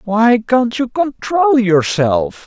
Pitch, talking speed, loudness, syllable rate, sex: 220 Hz, 120 wpm, -14 LUFS, 3.0 syllables/s, male